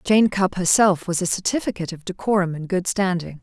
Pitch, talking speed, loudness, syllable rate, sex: 185 Hz, 195 wpm, -21 LUFS, 5.7 syllables/s, female